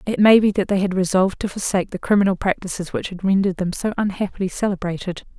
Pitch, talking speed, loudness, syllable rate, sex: 190 Hz, 210 wpm, -20 LUFS, 6.9 syllables/s, female